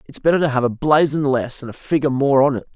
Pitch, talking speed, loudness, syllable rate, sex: 140 Hz, 305 wpm, -18 LUFS, 7.0 syllables/s, male